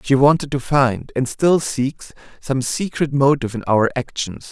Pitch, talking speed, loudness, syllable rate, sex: 135 Hz, 175 wpm, -19 LUFS, 4.4 syllables/s, male